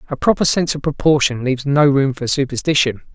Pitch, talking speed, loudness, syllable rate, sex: 140 Hz, 190 wpm, -16 LUFS, 6.3 syllables/s, male